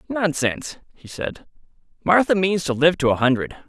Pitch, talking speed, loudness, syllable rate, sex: 155 Hz, 165 wpm, -20 LUFS, 5.1 syllables/s, male